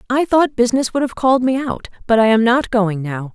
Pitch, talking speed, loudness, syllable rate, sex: 235 Hz, 250 wpm, -16 LUFS, 5.8 syllables/s, female